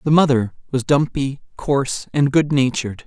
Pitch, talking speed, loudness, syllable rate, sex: 135 Hz, 135 wpm, -19 LUFS, 5.0 syllables/s, male